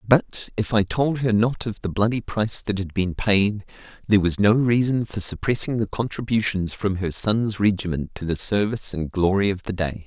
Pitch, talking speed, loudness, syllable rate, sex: 105 Hz, 205 wpm, -22 LUFS, 5.1 syllables/s, male